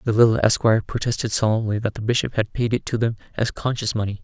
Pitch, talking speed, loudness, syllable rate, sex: 110 Hz, 225 wpm, -21 LUFS, 6.9 syllables/s, male